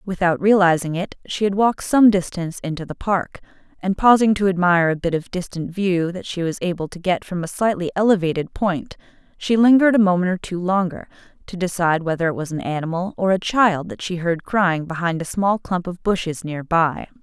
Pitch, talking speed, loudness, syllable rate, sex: 180 Hz, 210 wpm, -20 LUFS, 5.6 syllables/s, female